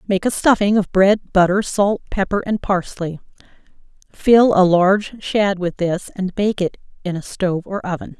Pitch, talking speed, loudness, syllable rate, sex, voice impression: 190 Hz, 175 wpm, -18 LUFS, 4.6 syllables/s, female, feminine, adult-like, tensed, slightly soft, slightly halting, calm, friendly, slightly reassuring, elegant, lively, slightly sharp